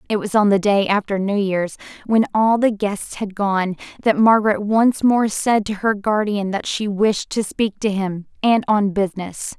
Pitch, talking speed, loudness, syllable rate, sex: 205 Hz, 200 wpm, -19 LUFS, 4.4 syllables/s, female